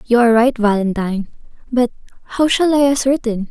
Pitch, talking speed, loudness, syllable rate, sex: 240 Hz, 155 wpm, -16 LUFS, 6.0 syllables/s, female